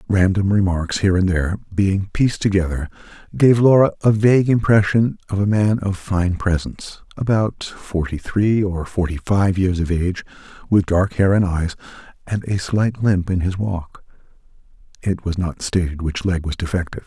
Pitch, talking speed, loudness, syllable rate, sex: 95 Hz, 165 wpm, -19 LUFS, 5.0 syllables/s, male